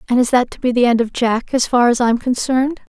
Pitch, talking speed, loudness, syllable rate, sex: 245 Hz, 285 wpm, -16 LUFS, 6.0 syllables/s, female